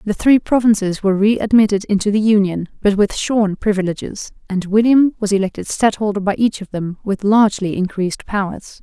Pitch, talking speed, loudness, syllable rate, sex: 205 Hz, 175 wpm, -16 LUFS, 5.5 syllables/s, female